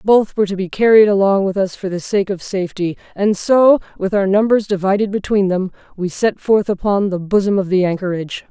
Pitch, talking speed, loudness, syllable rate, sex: 195 Hz, 210 wpm, -16 LUFS, 5.6 syllables/s, female